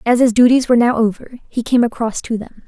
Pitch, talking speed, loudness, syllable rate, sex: 235 Hz, 245 wpm, -15 LUFS, 6.4 syllables/s, female